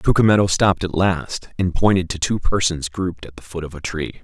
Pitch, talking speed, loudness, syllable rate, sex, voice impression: 90 Hz, 225 wpm, -20 LUFS, 5.7 syllables/s, male, masculine, adult-like, thick, tensed, powerful, slightly hard, clear, fluent, cool, intellectual, calm, mature, wild, lively, slightly strict